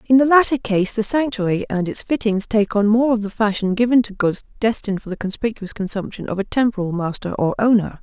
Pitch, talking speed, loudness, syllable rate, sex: 215 Hz, 215 wpm, -19 LUFS, 5.8 syllables/s, female